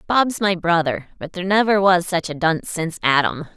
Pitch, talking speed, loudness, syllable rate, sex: 175 Hz, 200 wpm, -19 LUFS, 5.6 syllables/s, female